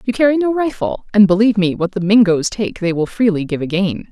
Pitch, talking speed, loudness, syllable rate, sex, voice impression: 200 Hz, 235 wpm, -15 LUFS, 5.9 syllables/s, female, feminine, adult-like, tensed, clear, fluent, intellectual, slightly friendly, elegant, lively, slightly strict, slightly sharp